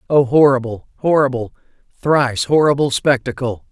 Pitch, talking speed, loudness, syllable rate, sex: 135 Hz, 95 wpm, -16 LUFS, 5.2 syllables/s, male